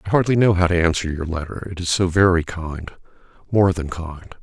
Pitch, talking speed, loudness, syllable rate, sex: 90 Hz, 205 wpm, -20 LUFS, 5.4 syllables/s, male